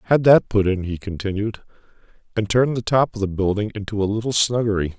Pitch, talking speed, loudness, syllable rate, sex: 105 Hz, 205 wpm, -20 LUFS, 6.2 syllables/s, male